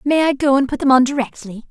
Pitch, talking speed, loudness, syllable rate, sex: 265 Hz, 280 wpm, -16 LUFS, 6.4 syllables/s, female